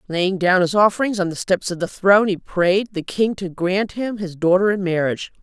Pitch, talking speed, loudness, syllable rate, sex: 190 Hz, 230 wpm, -19 LUFS, 5.2 syllables/s, female